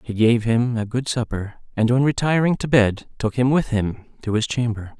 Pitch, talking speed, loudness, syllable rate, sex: 120 Hz, 215 wpm, -21 LUFS, 5.0 syllables/s, male